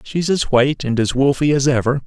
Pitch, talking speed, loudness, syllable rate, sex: 135 Hz, 235 wpm, -17 LUFS, 5.7 syllables/s, male